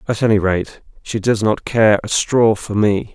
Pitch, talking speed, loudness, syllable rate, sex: 110 Hz, 210 wpm, -16 LUFS, 4.3 syllables/s, male